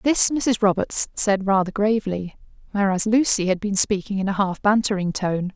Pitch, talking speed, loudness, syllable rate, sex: 200 Hz, 175 wpm, -21 LUFS, 4.9 syllables/s, female